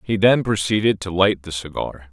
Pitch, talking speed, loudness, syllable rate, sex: 95 Hz, 200 wpm, -20 LUFS, 5.0 syllables/s, male